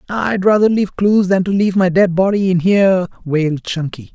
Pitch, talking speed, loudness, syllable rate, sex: 185 Hz, 205 wpm, -15 LUFS, 5.5 syllables/s, male